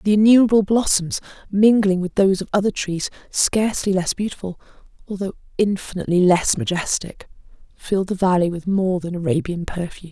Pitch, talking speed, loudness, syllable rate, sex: 190 Hz, 140 wpm, -19 LUFS, 5.8 syllables/s, female